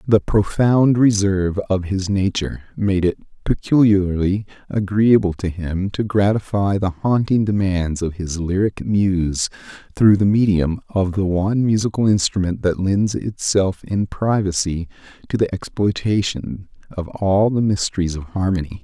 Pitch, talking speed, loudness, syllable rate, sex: 100 Hz, 135 wpm, -19 LUFS, 4.4 syllables/s, male